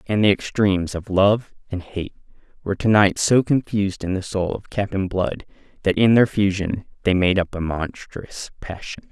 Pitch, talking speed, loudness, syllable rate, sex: 100 Hz, 185 wpm, -21 LUFS, 4.8 syllables/s, male